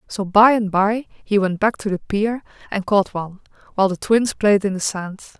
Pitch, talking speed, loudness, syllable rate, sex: 205 Hz, 220 wpm, -19 LUFS, 4.9 syllables/s, female